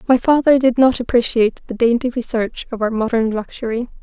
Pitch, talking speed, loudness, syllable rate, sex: 240 Hz, 180 wpm, -17 LUFS, 5.7 syllables/s, female